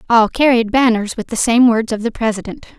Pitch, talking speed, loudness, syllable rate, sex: 230 Hz, 215 wpm, -15 LUFS, 5.7 syllables/s, female